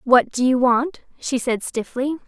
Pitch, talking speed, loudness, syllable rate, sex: 255 Hz, 185 wpm, -20 LUFS, 4.2 syllables/s, female